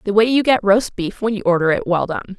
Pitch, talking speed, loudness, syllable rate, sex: 205 Hz, 300 wpm, -17 LUFS, 6.2 syllables/s, female